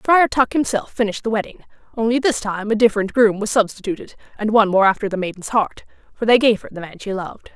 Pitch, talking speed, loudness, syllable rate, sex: 215 Hz, 220 wpm, -19 LUFS, 6.5 syllables/s, female